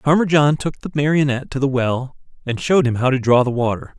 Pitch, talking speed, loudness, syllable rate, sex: 135 Hz, 240 wpm, -18 LUFS, 6.2 syllables/s, male